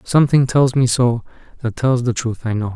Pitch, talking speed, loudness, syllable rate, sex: 120 Hz, 220 wpm, -17 LUFS, 5.3 syllables/s, male